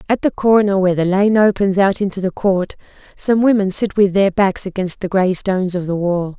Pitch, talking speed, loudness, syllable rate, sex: 195 Hz, 225 wpm, -16 LUFS, 5.3 syllables/s, female